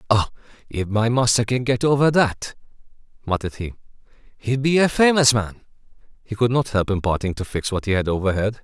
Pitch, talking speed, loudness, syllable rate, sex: 115 Hz, 180 wpm, -20 LUFS, 5.9 syllables/s, male